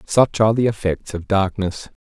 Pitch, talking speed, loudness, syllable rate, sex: 100 Hz, 175 wpm, -19 LUFS, 5.0 syllables/s, male